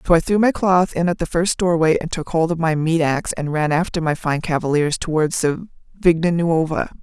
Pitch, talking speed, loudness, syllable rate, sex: 165 Hz, 230 wpm, -19 LUFS, 5.3 syllables/s, female